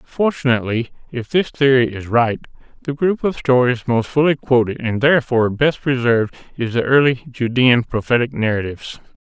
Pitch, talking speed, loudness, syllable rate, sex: 125 Hz, 150 wpm, -17 LUFS, 5.4 syllables/s, male